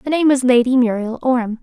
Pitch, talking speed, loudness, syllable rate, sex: 250 Hz, 220 wpm, -16 LUFS, 5.7 syllables/s, female